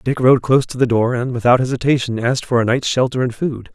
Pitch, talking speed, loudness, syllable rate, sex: 125 Hz, 255 wpm, -17 LUFS, 6.3 syllables/s, male